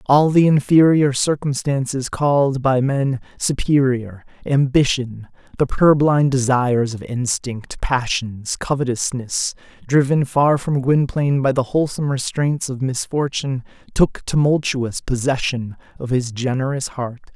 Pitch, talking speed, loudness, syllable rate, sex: 135 Hz, 115 wpm, -19 LUFS, 4.3 syllables/s, male